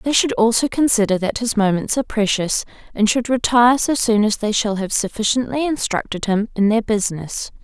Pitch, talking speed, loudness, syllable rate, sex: 220 Hz, 190 wpm, -18 LUFS, 5.5 syllables/s, female